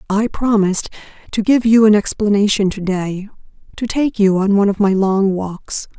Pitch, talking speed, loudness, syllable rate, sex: 205 Hz, 170 wpm, -16 LUFS, 5.0 syllables/s, female